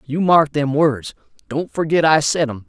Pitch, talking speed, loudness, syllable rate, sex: 145 Hz, 200 wpm, -17 LUFS, 4.5 syllables/s, male